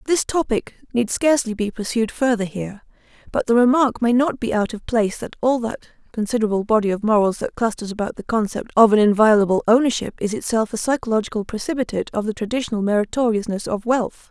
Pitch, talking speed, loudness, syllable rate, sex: 225 Hz, 185 wpm, -20 LUFS, 6.4 syllables/s, female